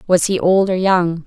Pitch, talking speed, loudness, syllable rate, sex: 180 Hz, 240 wpm, -15 LUFS, 4.5 syllables/s, female